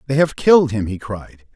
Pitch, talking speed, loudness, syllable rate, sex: 125 Hz, 230 wpm, -16 LUFS, 5.3 syllables/s, male